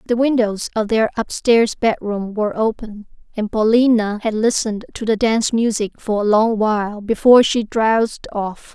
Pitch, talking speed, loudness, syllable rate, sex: 220 Hz, 165 wpm, -17 LUFS, 4.9 syllables/s, female